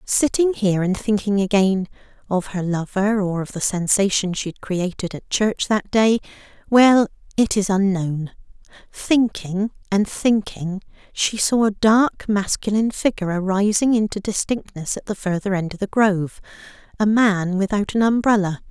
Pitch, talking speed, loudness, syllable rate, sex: 200 Hz, 140 wpm, -20 LUFS, 4.7 syllables/s, female